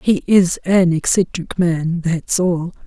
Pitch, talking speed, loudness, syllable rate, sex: 175 Hz, 145 wpm, -17 LUFS, 3.4 syllables/s, female